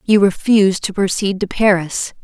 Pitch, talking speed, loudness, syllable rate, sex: 195 Hz, 160 wpm, -16 LUFS, 4.8 syllables/s, female